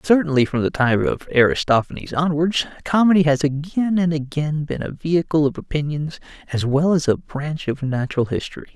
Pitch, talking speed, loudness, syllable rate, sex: 150 Hz, 170 wpm, -20 LUFS, 5.5 syllables/s, male